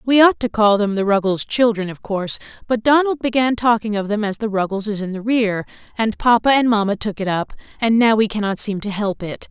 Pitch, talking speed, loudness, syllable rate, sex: 215 Hz, 235 wpm, -18 LUFS, 5.6 syllables/s, female